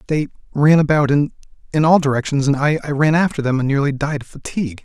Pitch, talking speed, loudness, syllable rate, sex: 145 Hz, 175 wpm, -17 LUFS, 6.4 syllables/s, male